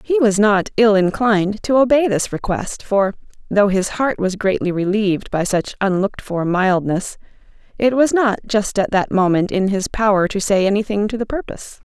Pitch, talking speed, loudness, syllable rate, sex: 205 Hz, 185 wpm, -17 LUFS, 5.0 syllables/s, female